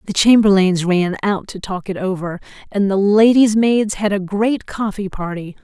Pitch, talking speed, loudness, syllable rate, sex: 200 Hz, 170 wpm, -16 LUFS, 4.5 syllables/s, female